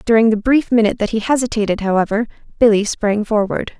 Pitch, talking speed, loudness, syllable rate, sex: 220 Hz, 175 wpm, -16 LUFS, 6.3 syllables/s, female